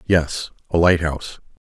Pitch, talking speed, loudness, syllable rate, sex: 80 Hz, 110 wpm, -20 LUFS, 4.3 syllables/s, male